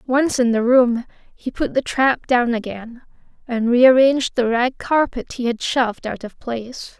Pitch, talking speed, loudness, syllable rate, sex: 245 Hz, 180 wpm, -18 LUFS, 4.4 syllables/s, female